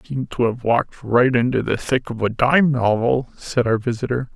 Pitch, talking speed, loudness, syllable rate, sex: 125 Hz, 220 wpm, -19 LUFS, 5.1 syllables/s, male